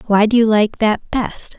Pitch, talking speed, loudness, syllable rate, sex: 215 Hz, 230 wpm, -16 LUFS, 4.3 syllables/s, female